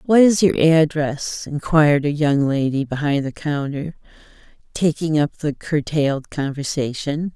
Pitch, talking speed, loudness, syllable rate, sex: 150 Hz, 130 wpm, -19 LUFS, 4.3 syllables/s, female